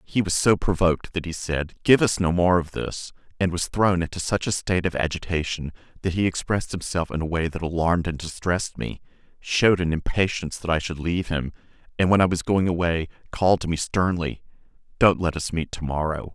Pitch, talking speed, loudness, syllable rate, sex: 85 Hz, 215 wpm, -23 LUFS, 5.8 syllables/s, male